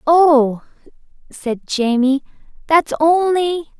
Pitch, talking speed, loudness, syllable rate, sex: 295 Hz, 80 wpm, -16 LUFS, 3.0 syllables/s, female